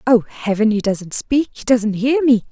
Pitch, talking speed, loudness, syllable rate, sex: 230 Hz, 190 wpm, -17 LUFS, 4.4 syllables/s, female